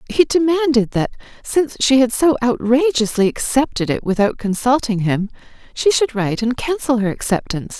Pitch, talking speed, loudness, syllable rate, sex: 245 Hz, 155 wpm, -17 LUFS, 5.3 syllables/s, female